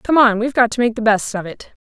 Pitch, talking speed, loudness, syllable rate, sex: 230 Hz, 330 wpm, -16 LUFS, 6.4 syllables/s, female